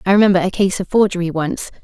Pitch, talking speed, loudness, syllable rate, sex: 185 Hz, 230 wpm, -16 LUFS, 6.8 syllables/s, female